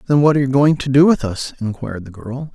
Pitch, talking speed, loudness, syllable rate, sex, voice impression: 130 Hz, 285 wpm, -16 LUFS, 6.6 syllables/s, male, masculine, very adult-like, slightly thick, cool, slightly sincere, slightly sweet